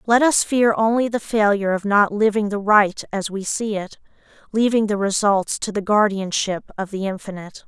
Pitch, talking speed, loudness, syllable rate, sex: 205 Hz, 190 wpm, -19 LUFS, 5.1 syllables/s, female